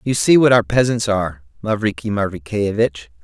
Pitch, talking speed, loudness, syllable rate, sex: 105 Hz, 150 wpm, -17 LUFS, 5.3 syllables/s, male